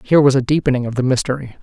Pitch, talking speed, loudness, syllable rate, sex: 135 Hz, 260 wpm, -17 LUFS, 8.0 syllables/s, male